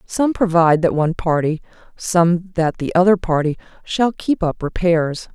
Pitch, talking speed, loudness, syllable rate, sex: 175 Hz, 155 wpm, -18 LUFS, 4.6 syllables/s, female